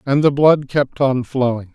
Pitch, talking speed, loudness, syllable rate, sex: 130 Hz, 205 wpm, -16 LUFS, 4.3 syllables/s, male